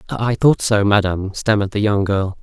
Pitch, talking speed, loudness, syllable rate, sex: 105 Hz, 200 wpm, -17 LUFS, 5.7 syllables/s, male